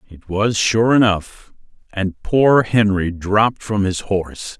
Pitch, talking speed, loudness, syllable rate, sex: 100 Hz, 145 wpm, -17 LUFS, 3.8 syllables/s, male